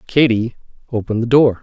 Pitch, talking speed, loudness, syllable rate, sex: 120 Hz, 150 wpm, -17 LUFS, 6.2 syllables/s, male